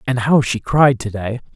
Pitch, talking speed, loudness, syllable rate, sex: 125 Hz, 230 wpm, -17 LUFS, 4.8 syllables/s, male